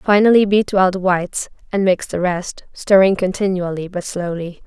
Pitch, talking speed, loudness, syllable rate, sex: 185 Hz, 165 wpm, -17 LUFS, 4.9 syllables/s, female